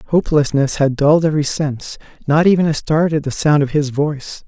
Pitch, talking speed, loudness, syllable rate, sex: 150 Hz, 200 wpm, -16 LUFS, 5.8 syllables/s, male